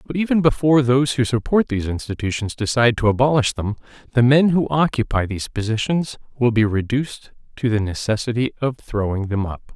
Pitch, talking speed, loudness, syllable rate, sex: 120 Hz, 170 wpm, -20 LUFS, 5.9 syllables/s, male